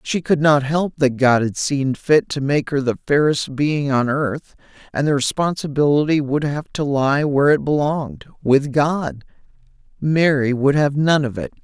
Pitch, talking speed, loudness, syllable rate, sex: 140 Hz, 175 wpm, -18 LUFS, 4.5 syllables/s, male